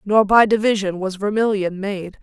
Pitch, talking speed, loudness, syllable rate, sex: 200 Hz, 160 wpm, -18 LUFS, 4.8 syllables/s, female